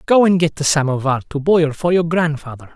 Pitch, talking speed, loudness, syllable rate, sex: 155 Hz, 220 wpm, -16 LUFS, 5.5 syllables/s, male